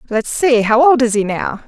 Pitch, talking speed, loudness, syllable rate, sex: 240 Hz, 215 wpm, -14 LUFS, 4.9 syllables/s, female